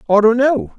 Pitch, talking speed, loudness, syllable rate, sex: 215 Hz, 230 wpm, -14 LUFS, 5.2 syllables/s, male